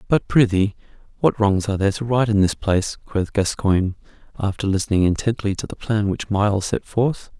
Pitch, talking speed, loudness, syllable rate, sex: 105 Hz, 185 wpm, -20 LUFS, 5.7 syllables/s, male